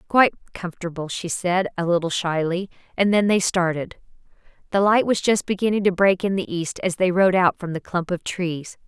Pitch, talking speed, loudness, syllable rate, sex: 185 Hz, 205 wpm, -21 LUFS, 5.3 syllables/s, female